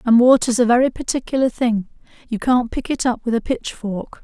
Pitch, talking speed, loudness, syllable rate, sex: 235 Hz, 200 wpm, -19 LUFS, 5.4 syllables/s, female